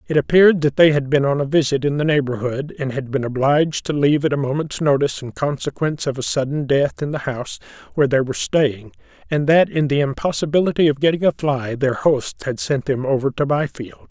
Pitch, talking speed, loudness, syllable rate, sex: 140 Hz, 220 wpm, -19 LUFS, 6.0 syllables/s, male